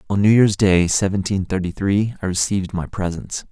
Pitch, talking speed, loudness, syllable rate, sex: 95 Hz, 190 wpm, -19 LUFS, 5.3 syllables/s, male